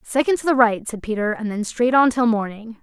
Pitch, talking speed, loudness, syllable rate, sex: 230 Hz, 255 wpm, -19 LUFS, 5.5 syllables/s, female